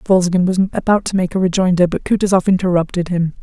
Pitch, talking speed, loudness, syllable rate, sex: 185 Hz, 195 wpm, -16 LUFS, 6.4 syllables/s, female